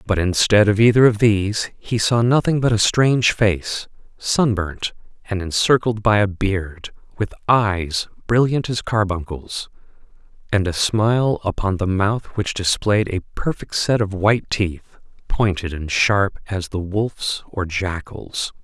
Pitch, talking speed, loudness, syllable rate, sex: 100 Hz, 150 wpm, -19 LUFS, 4.1 syllables/s, male